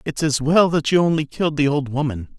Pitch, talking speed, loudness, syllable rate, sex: 145 Hz, 250 wpm, -19 LUFS, 5.7 syllables/s, male